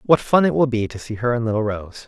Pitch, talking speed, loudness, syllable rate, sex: 120 Hz, 315 wpm, -20 LUFS, 6.1 syllables/s, male